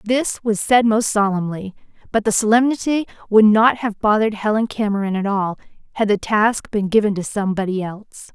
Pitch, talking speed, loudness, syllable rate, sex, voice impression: 210 Hz, 175 wpm, -18 LUFS, 5.4 syllables/s, female, feminine, slightly adult-like, slightly fluent, slightly intellectual, slightly strict